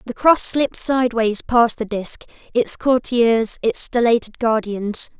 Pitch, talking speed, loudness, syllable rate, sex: 235 Hz, 140 wpm, -18 LUFS, 4.4 syllables/s, female